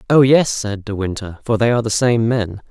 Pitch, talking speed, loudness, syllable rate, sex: 110 Hz, 245 wpm, -17 LUFS, 5.4 syllables/s, male